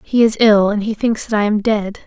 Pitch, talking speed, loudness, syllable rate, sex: 215 Hz, 290 wpm, -15 LUFS, 5.3 syllables/s, female